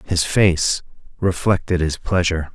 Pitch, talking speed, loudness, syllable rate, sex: 85 Hz, 120 wpm, -19 LUFS, 4.3 syllables/s, male